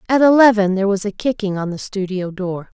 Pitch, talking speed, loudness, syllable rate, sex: 205 Hz, 215 wpm, -17 LUFS, 5.9 syllables/s, female